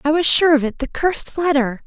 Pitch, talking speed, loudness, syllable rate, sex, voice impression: 290 Hz, 225 wpm, -17 LUFS, 5.7 syllables/s, female, very feminine, slightly young, slightly adult-like, thin, tensed, slightly powerful, bright, soft, clear, fluent, very cute, intellectual, refreshing, very sincere, very calm, very friendly, very reassuring, very unique, very elegant, slightly wild, very sweet, very lively, kind, slightly sharp, slightly modest